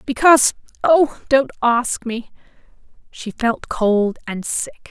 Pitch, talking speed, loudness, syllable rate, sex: 240 Hz, 110 wpm, -18 LUFS, 3.5 syllables/s, female